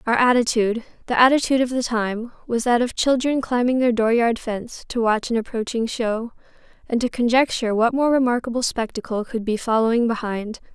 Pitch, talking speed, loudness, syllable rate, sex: 235 Hz, 160 wpm, -21 LUFS, 5.7 syllables/s, female